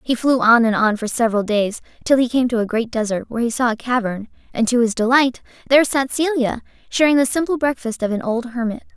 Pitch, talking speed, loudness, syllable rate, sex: 240 Hz, 235 wpm, -18 LUFS, 6.0 syllables/s, female